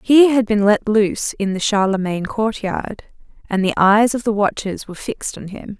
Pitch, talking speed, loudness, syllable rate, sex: 210 Hz, 195 wpm, -18 LUFS, 5.2 syllables/s, female